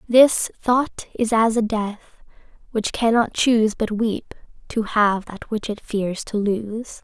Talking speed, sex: 160 wpm, female